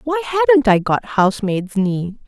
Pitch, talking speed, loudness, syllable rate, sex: 240 Hz, 160 wpm, -17 LUFS, 4.3 syllables/s, female